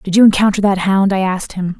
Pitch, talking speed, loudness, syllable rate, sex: 195 Hz, 265 wpm, -14 LUFS, 6.3 syllables/s, female